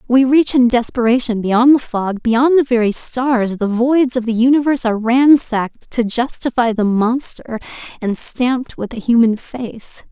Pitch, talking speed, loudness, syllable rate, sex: 240 Hz, 165 wpm, -15 LUFS, 4.5 syllables/s, female